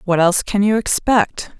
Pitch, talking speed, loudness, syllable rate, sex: 200 Hz, 190 wpm, -16 LUFS, 4.8 syllables/s, female